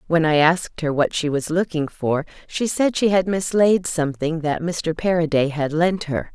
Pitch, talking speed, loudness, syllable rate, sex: 165 Hz, 200 wpm, -20 LUFS, 4.7 syllables/s, female